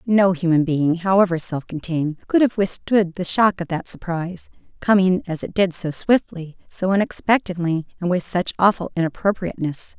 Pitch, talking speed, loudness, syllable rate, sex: 180 Hz, 155 wpm, -20 LUFS, 5.2 syllables/s, female